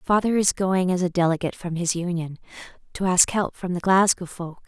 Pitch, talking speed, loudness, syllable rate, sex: 180 Hz, 205 wpm, -22 LUFS, 5.4 syllables/s, female